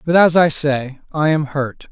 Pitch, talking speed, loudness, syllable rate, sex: 150 Hz, 220 wpm, -16 LUFS, 4.2 syllables/s, male